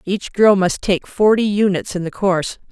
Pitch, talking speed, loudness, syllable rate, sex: 195 Hz, 200 wpm, -17 LUFS, 4.8 syllables/s, female